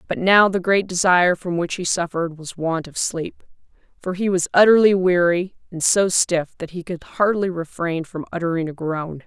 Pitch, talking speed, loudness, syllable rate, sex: 175 Hz, 195 wpm, -19 LUFS, 5.0 syllables/s, female